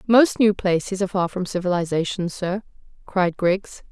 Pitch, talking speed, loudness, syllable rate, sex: 185 Hz, 155 wpm, -22 LUFS, 4.9 syllables/s, female